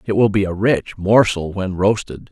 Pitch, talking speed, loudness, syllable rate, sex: 100 Hz, 205 wpm, -17 LUFS, 4.6 syllables/s, male